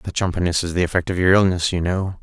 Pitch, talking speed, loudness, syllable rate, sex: 90 Hz, 270 wpm, -19 LUFS, 6.4 syllables/s, male